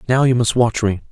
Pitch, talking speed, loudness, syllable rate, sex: 120 Hz, 270 wpm, -16 LUFS, 5.8 syllables/s, male